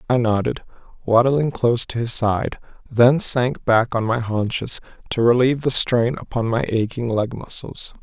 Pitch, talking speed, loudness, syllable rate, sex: 120 Hz, 165 wpm, -20 LUFS, 4.6 syllables/s, male